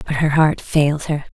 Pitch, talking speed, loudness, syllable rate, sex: 150 Hz, 220 wpm, -18 LUFS, 5.1 syllables/s, female